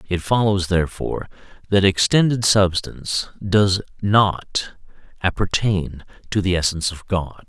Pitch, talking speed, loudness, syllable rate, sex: 95 Hz, 110 wpm, -20 LUFS, 4.4 syllables/s, male